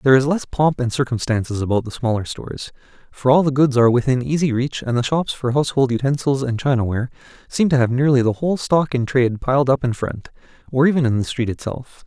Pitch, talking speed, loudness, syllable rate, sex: 130 Hz, 225 wpm, -19 LUFS, 6.3 syllables/s, male